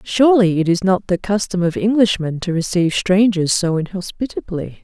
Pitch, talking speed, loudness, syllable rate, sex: 190 Hz, 160 wpm, -17 LUFS, 5.3 syllables/s, female